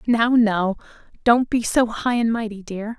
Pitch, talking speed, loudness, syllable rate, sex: 225 Hz, 160 wpm, -20 LUFS, 4.3 syllables/s, female